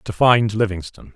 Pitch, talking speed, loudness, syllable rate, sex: 105 Hz, 155 wpm, -17 LUFS, 5.4 syllables/s, male